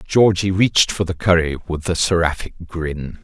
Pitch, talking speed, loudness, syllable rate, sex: 85 Hz, 165 wpm, -18 LUFS, 4.6 syllables/s, male